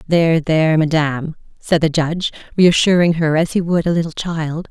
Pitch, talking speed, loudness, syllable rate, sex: 160 Hz, 180 wpm, -16 LUFS, 5.4 syllables/s, female